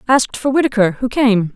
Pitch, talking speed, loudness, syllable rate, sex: 235 Hz, 195 wpm, -15 LUFS, 5.8 syllables/s, female